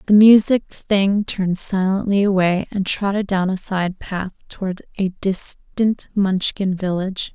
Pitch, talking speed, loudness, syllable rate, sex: 195 Hz, 140 wpm, -19 LUFS, 4.1 syllables/s, female